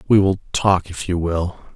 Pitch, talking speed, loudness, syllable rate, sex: 90 Hz, 205 wpm, -20 LUFS, 4.6 syllables/s, male